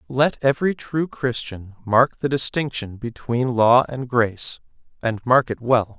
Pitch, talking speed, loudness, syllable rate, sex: 125 Hz, 150 wpm, -21 LUFS, 4.2 syllables/s, male